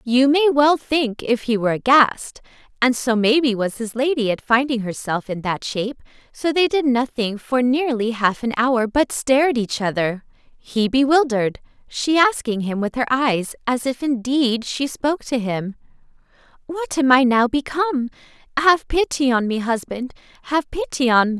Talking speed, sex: 190 wpm, female